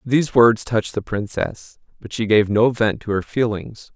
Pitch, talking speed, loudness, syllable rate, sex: 110 Hz, 195 wpm, -19 LUFS, 4.7 syllables/s, male